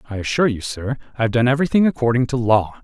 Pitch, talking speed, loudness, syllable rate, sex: 125 Hz, 235 wpm, -19 LUFS, 7.6 syllables/s, male